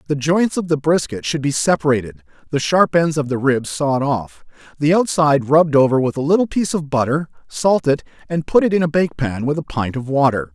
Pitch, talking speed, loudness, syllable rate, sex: 145 Hz, 220 wpm, -18 LUFS, 5.7 syllables/s, male